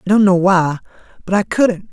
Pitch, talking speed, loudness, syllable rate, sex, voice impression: 190 Hz, 220 wpm, -15 LUFS, 5.4 syllables/s, male, masculine, adult-like, tensed, powerful, fluent, raspy, intellectual, calm, slightly reassuring, slightly wild, lively, slightly strict